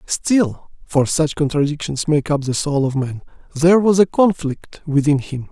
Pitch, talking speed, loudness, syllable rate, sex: 150 Hz, 175 wpm, -18 LUFS, 2.7 syllables/s, male